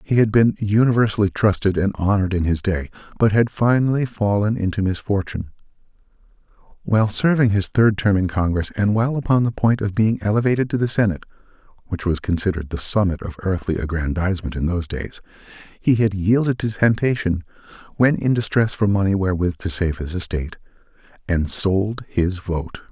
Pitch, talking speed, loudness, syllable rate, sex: 100 Hz, 160 wpm, -20 LUFS, 5.8 syllables/s, male